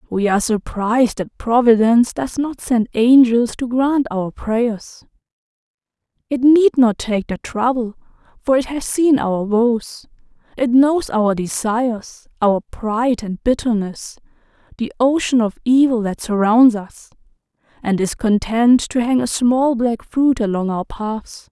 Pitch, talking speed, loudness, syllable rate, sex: 235 Hz, 145 wpm, -17 LUFS, 4.0 syllables/s, female